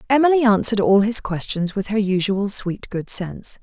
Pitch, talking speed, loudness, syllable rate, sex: 210 Hz, 180 wpm, -19 LUFS, 5.2 syllables/s, female